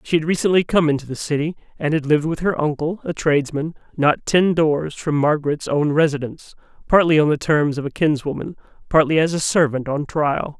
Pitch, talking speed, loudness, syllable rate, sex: 155 Hz, 200 wpm, -19 LUFS, 5.7 syllables/s, male